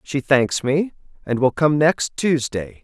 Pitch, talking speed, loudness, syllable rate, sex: 140 Hz, 170 wpm, -19 LUFS, 3.8 syllables/s, male